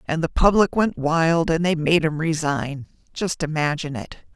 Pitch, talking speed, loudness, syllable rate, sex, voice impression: 160 Hz, 165 wpm, -21 LUFS, 4.6 syllables/s, female, very feminine, middle-aged, slightly thin, slightly tensed, powerful, dark, slightly soft, clear, fluent, cool, intellectual, refreshing, very sincere, very calm, very friendly, very reassuring, very unique, very elegant, wild, sweet, strict, slightly sharp